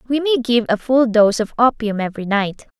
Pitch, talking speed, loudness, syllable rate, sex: 230 Hz, 215 wpm, -17 LUFS, 5.6 syllables/s, female